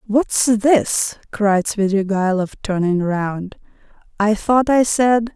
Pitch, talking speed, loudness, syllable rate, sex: 210 Hz, 110 wpm, -17 LUFS, 3.2 syllables/s, female